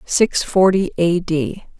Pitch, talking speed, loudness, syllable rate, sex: 180 Hz, 135 wpm, -17 LUFS, 2.0 syllables/s, female